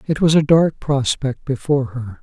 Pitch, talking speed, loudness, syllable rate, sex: 140 Hz, 190 wpm, -18 LUFS, 4.9 syllables/s, male